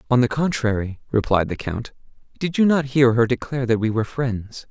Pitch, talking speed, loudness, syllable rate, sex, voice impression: 125 Hz, 205 wpm, -21 LUFS, 5.5 syllables/s, male, masculine, slightly young, slightly adult-like, slightly thick, slightly relaxed, slightly weak, slightly bright, slightly soft, slightly clear, slightly fluent, slightly cool, intellectual, slightly refreshing, very sincere, calm, slightly mature, friendly, reassuring, slightly wild, slightly lively, kind, slightly modest